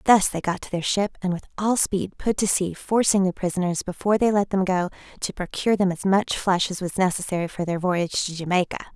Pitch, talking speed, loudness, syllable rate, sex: 190 Hz, 235 wpm, -23 LUFS, 5.9 syllables/s, female